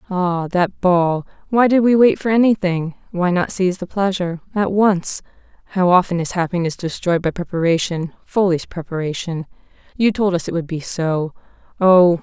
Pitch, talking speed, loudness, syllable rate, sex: 180 Hz, 140 wpm, -18 LUFS, 5.0 syllables/s, female